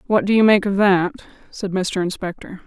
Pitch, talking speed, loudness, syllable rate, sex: 190 Hz, 200 wpm, -18 LUFS, 5.2 syllables/s, female